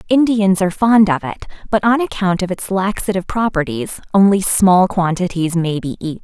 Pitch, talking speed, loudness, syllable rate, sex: 190 Hz, 175 wpm, -16 LUFS, 5.4 syllables/s, female